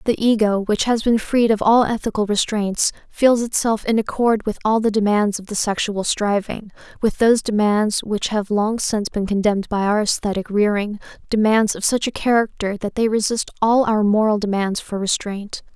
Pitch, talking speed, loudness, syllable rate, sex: 215 Hz, 185 wpm, -19 LUFS, 5.0 syllables/s, female